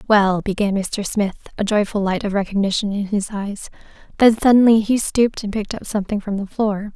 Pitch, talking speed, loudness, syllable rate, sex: 205 Hz, 200 wpm, -19 LUFS, 5.5 syllables/s, female